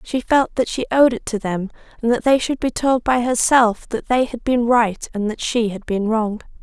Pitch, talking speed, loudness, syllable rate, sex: 235 Hz, 235 wpm, -19 LUFS, 4.6 syllables/s, female